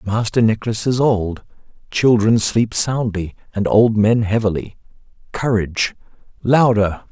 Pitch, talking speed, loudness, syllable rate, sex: 110 Hz, 110 wpm, -17 LUFS, 4.2 syllables/s, male